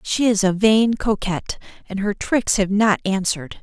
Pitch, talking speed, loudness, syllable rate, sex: 205 Hz, 180 wpm, -19 LUFS, 4.7 syllables/s, female